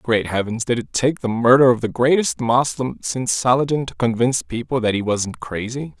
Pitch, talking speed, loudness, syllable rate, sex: 120 Hz, 200 wpm, -19 LUFS, 5.3 syllables/s, male